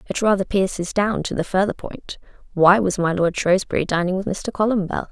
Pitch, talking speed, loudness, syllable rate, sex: 190 Hz, 200 wpm, -20 LUFS, 5.5 syllables/s, female